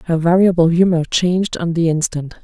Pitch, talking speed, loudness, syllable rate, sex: 170 Hz, 170 wpm, -15 LUFS, 5.7 syllables/s, female